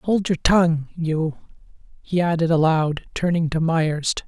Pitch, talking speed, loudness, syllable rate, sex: 165 Hz, 140 wpm, -21 LUFS, 4.1 syllables/s, male